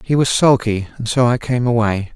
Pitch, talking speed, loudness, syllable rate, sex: 120 Hz, 225 wpm, -16 LUFS, 5.2 syllables/s, male